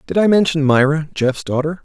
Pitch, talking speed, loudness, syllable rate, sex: 155 Hz, 195 wpm, -16 LUFS, 5.5 syllables/s, male